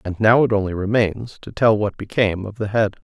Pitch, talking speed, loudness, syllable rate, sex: 105 Hz, 230 wpm, -19 LUFS, 5.6 syllables/s, male